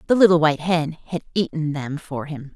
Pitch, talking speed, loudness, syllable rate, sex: 160 Hz, 210 wpm, -21 LUFS, 5.3 syllables/s, female